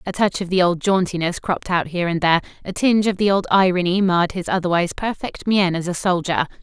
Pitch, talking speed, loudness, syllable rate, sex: 180 Hz, 225 wpm, -19 LUFS, 6.5 syllables/s, female